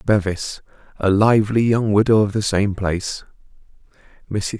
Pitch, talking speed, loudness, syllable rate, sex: 105 Hz, 130 wpm, -19 LUFS, 4.8 syllables/s, male